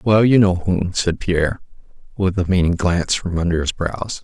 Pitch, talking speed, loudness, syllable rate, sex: 90 Hz, 200 wpm, -18 LUFS, 5.1 syllables/s, male